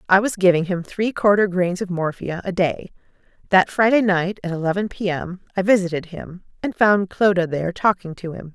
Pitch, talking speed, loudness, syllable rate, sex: 185 Hz, 195 wpm, -20 LUFS, 5.3 syllables/s, female